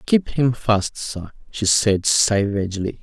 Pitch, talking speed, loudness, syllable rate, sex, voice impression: 110 Hz, 140 wpm, -19 LUFS, 3.7 syllables/s, male, masculine, adult-like, relaxed, slightly powerful, muffled, cool, calm, slightly mature, friendly, wild, slightly lively, slightly kind